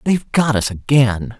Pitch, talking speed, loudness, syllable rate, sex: 120 Hz, 170 wpm, -16 LUFS, 4.7 syllables/s, male